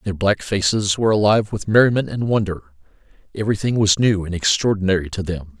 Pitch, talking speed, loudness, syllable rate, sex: 100 Hz, 160 wpm, -19 LUFS, 6.3 syllables/s, male